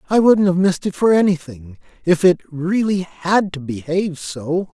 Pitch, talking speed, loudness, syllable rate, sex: 175 Hz, 165 wpm, -18 LUFS, 4.7 syllables/s, male